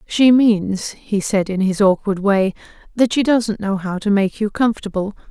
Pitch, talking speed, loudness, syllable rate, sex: 205 Hz, 190 wpm, -17 LUFS, 4.6 syllables/s, female